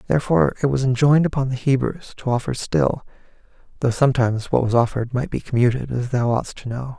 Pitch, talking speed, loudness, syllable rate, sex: 130 Hz, 200 wpm, -20 LUFS, 6.4 syllables/s, male